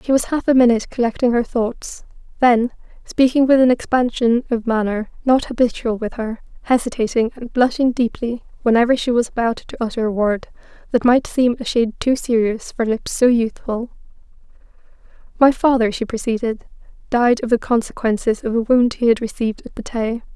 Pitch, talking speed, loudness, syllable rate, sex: 235 Hz, 170 wpm, -18 LUFS, 5.4 syllables/s, female